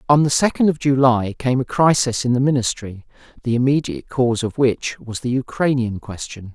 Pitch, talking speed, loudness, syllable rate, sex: 125 Hz, 185 wpm, -19 LUFS, 5.4 syllables/s, male